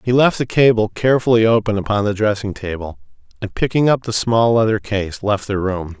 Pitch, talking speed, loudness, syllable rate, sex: 110 Hz, 200 wpm, -17 LUFS, 5.5 syllables/s, male